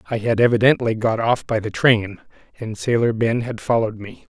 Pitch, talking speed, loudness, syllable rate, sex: 115 Hz, 195 wpm, -19 LUFS, 5.3 syllables/s, male